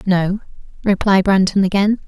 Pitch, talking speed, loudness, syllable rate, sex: 195 Hz, 115 wpm, -16 LUFS, 4.8 syllables/s, female